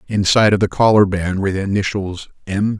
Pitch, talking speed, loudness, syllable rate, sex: 100 Hz, 195 wpm, -16 LUFS, 6.1 syllables/s, male